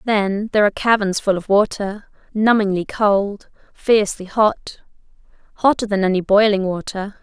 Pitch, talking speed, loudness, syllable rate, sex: 205 Hz, 125 wpm, -18 LUFS, 4.8 syllables/s, female